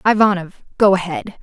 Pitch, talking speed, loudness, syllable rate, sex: 195 Hz, 125 wpm, -17 LUFS, 5.4 syllables/s, female